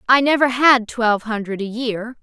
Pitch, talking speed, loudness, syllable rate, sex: 235 Hz, 190 wpm, -17 LUFS, 4.9 syllables/s, female